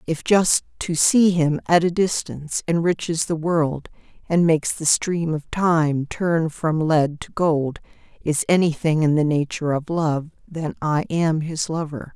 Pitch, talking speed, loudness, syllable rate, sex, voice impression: 160 Hz, 170 wpm, -21 LUFS, 4.1 syllables/s, female, feminine, middle-aged, tensed, powerful, hard, clear, slightly raspy, intellectual, calm, slightly reassuring, slightly strict, slightly sharp